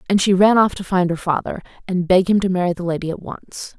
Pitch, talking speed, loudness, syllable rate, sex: 185 Hz, 270 wpm, -18 LUFS, 6.0 syllables/s, female